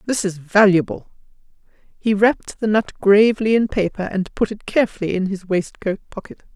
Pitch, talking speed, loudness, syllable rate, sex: 200 Hz, 165 wpm, -19 LUFS, 5.5 syllables/s, female